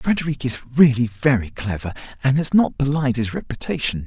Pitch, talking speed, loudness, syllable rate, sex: 125 Hz, 160 wpm, -20 LUFS, 5.4 syllables/s, male